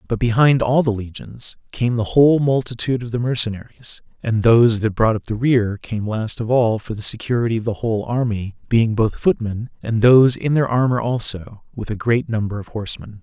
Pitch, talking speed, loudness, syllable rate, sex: 115 Hz, 205 wpm, -19 LUFS, 5.4 syllables/s, male